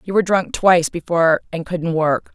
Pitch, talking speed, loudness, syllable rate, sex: 175 Hz, 205 wpm, -18 LUFS, 5.6 syllables/s, female